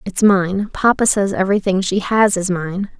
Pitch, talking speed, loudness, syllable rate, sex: 195 Hz, 180 wpm, -16 LUFS, 4.6 syllables/s, female